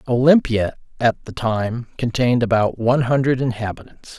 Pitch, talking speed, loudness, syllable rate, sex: 120 Hz, 130 wpm, -19 LUFS, 5.1 syllables/s, male